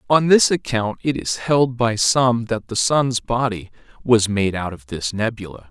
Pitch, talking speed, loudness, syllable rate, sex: 115 Hz, 190 wpm, -19 LUFS, 4.3 syllables/s, male